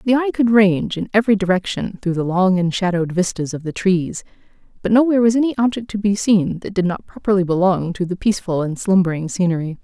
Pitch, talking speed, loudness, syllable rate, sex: 195 Hz, 215 wpm, -18 LUFS, 6.2 syllables/s, female